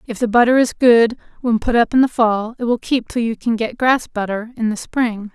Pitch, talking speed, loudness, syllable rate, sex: 230 Hz, 260 wpm, -17 LUFS, 5.1 syllables/s, female